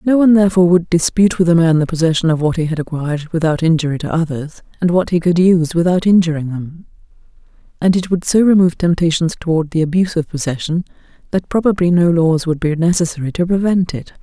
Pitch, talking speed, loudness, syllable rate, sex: 170 Hz, 200 wpm, -15 LUFS, 6.5 syllables/s, female